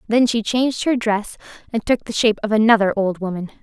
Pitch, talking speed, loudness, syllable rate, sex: 220 Hz, 215 wpm, -19 LUFS, 6.1 syllables/s, female